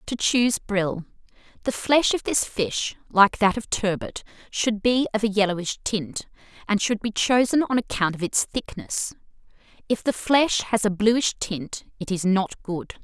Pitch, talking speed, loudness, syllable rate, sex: 210 Hz, 170 wpm, -23 LUFS, 4.3 syllables/s, female